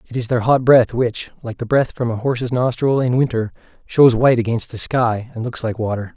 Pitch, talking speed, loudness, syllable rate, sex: 120 Hz, 235 wpm, -18 LUFS, 5.4 syllables/s, male